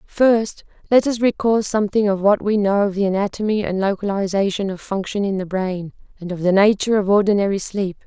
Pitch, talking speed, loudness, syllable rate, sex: 200 Hz, 195 wpm, -19 LUFS, 5.7 syllables/s, female